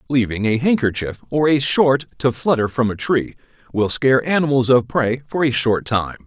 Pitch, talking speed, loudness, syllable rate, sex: 125 Hz, 190 wpm, -18 LUFS, 5.0 syllables/s, male